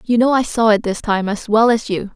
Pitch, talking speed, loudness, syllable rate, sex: 220 Hz, 305 wpm, -16 LUFS, 5.4 syllables/s, female